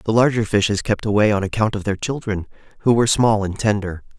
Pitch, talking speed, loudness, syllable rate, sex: 105 Hz, 215 wpm, -19 LUFS, 6.2 syllables/s, male